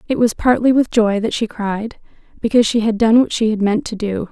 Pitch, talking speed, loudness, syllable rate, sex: 220 Hz, 235 wpm, -16 LUFS, 5.3 syllables/s, female